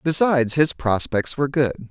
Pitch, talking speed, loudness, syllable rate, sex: 130 Hz, 155 wpm, -20 LUFS, 5.0 syllables/s, male